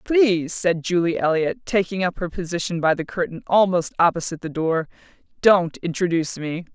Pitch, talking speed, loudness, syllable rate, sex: 175 Hz, 160 wpm, -21 LUFS, 5.4 syllables/s, female